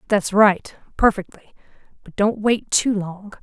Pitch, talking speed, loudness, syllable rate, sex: 205 Hz, 125 wpm, -19 LUFS, 4.0 syllables/s, female